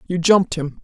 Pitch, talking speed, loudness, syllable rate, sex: 170 Hz, 215 wpm, -17 LUFS, 6.4 syllables/s, female